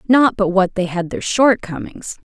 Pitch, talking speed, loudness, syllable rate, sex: 200 Hz, 180 wpm, -17 LUFS, 4.5 syllables/s, female